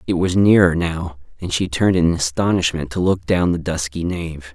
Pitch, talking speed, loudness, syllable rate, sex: 85 Hz, 200 wpm, -18 LUFS, 4.9 syllables/s, male